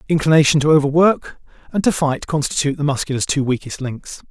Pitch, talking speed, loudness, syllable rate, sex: 145 Hz, 165 wpm, -17 LUFS, 6.2 syllables/s, male